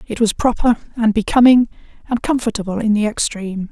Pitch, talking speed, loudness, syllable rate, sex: 220 Hz, 160 wpm, -17 LUFS, 5.8 syllables/s, female